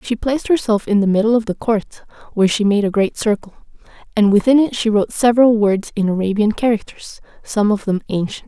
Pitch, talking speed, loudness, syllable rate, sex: 215 Hz, 205 wpm, -16 LUFS, 5.9 syllables/s, female